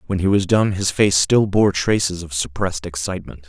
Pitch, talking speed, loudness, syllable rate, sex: 90 Hz, 205 wpm, -18 LUFS, 5.4 syllables/s, male